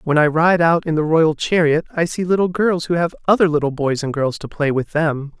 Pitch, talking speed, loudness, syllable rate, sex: 160 Hz, 255 wpm, -17 LUFS, 5.3 syllables/s, male